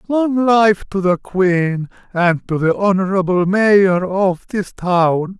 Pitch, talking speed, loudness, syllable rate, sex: 190 Hz, 145 wpm, -16 LUFS, 3.3 syllables/s, male